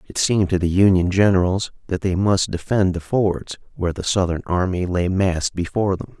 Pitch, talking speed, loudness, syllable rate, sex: 90 Hz, 195 wpm, -20 LUFS, 5.5 syllables/s, male